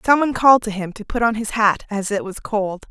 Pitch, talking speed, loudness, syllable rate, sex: 220 Hz, 290 wpm, -19 LUFS, 5.9 syllables/s, female